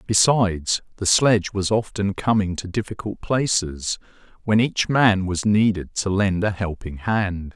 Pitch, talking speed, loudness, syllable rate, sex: 100 Hz, 150 wpm, -21 LUFS, 4.3 syllables/s, male